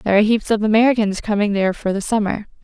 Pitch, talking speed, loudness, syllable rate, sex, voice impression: 210 Hz, 230 wpm, -18 LUFS, 6.9 syllables/s, female, feminine, adult-like, fluent, intellectual, slightly calm